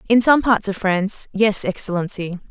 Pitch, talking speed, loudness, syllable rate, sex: 205 Hz, 145 wpm, -19 LUFS, 5.0 syllables/s, female